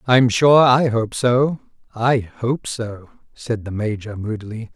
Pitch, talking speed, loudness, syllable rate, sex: 120 Hz, 150 wpm, -19 LUFS, 3.7 syllables/s, male